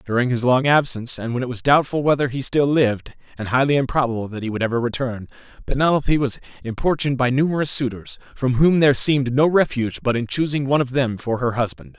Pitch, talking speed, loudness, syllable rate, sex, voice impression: 130 Hz, 210 wpm, -20 LUFS, 6.4 syllables/s, male, masculine, adult-like, tensed, powerful, bright, clear, nasal, cool, intellectual, wild, lively, intense